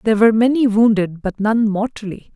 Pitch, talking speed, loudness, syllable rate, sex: 215 Hz, 180 wpm, -16 LUFS, 5.8 syllables/s, female